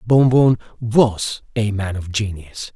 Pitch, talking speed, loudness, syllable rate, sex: 110 Hz, 155 wpm, -18 LUFS, 3.5 syllables/s, male